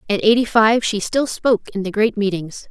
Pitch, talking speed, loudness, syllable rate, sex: 210 Hz, 220 wpm, -18 LUFS, 5.5 syllables/s, female